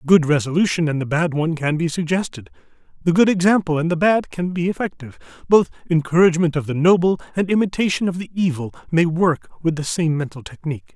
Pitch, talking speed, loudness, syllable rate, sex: 165 Hz, 195 wpm, -19 LUFS, 6.3 syllables/s, male